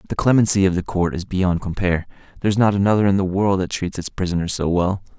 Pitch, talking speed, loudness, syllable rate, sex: 95 Hz, 230 wpm, -20 LUFS, 6.5 syllables/s, male